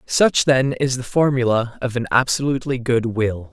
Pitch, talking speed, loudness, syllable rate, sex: 125 Hz, 170 wpm, -19 LUFS, 4.8 syllables/s, male